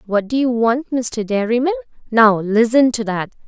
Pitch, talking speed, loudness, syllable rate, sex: 235 Hz, 155 wpm, -17 LUFS, 4.6 syllables/s, female